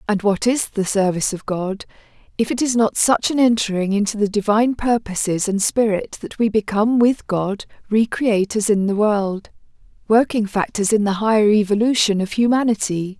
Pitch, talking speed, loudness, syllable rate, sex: 210 Hz, 170 wpm, -18 LUFS, 5.1 syllables/s, female